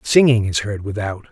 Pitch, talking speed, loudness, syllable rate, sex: 110 Hz, 180 wpm, -18 LUFS, 5.0 syllables/s, male